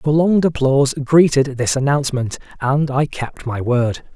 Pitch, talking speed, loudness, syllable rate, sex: 140 Hz, 145 wpm, -17 LUFS, 4.7 syllables/s, male